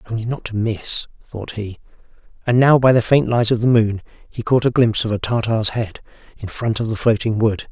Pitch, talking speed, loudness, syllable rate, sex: 115 Hz, 225 wpm, -18 LUFS, 5.4 syllables/s, male